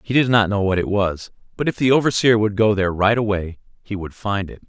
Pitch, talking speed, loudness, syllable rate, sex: 105 Hz, 255 wpm, -19 LUFS, 5.9 syllables/s, male